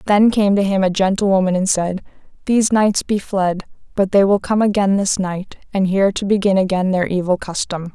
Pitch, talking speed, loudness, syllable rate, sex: 195 Hz, 205 wpm, -17 LUFS, 5.4 syllables/s, female